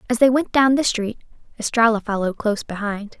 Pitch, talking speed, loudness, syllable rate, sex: 225 Hz, 190 wpm, -20 LUFS, 6.2 syllables/s, female